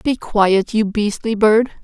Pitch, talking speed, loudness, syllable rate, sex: 215 Hz, 165 wpm, -16 LUFS, 3.6 syllables/s, female